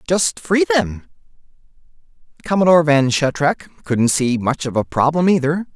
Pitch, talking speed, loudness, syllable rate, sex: 150 Hz, 135 wpm, -17 LUFS, 4.7 syllables/s, male